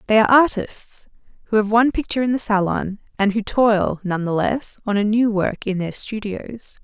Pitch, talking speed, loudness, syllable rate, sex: 215 Hz, 200 wpm, -19 LUFS, 5.1 syllables/s, female